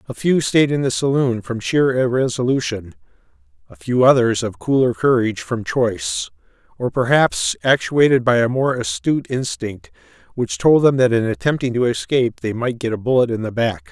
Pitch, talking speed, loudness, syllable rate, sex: 125 Hz, 175 wpm, -18 LUFS, 5.2 syllables/s, male